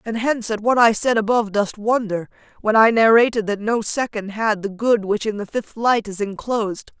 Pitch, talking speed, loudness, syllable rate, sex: 220 Hz, 215 wpm, -19 LUFS, 5.2 syllables/s, female